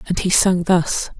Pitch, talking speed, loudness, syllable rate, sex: 175 Hz, 200 wpm, -17 LUFS, 4.2 syllables/s, female